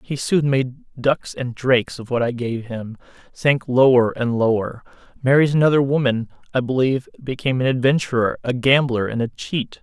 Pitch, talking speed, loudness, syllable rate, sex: 130 Hz, 170 wpm, -20 LUFS, 5.0 syllables/s, male